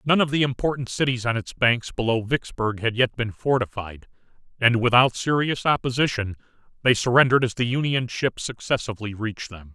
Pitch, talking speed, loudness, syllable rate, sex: 120 Hz, 165 wpm, -22 LUFS, 5.6 syllables/s, male